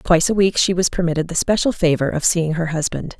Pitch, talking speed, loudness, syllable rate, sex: 170 Hz, 245 wpm, -18 LUFS, 6.2 syllables/s, female